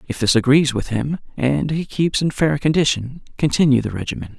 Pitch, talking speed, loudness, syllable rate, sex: 140 Hz, 190 wpm, -19 LUFS, 5.4 syllables/s, male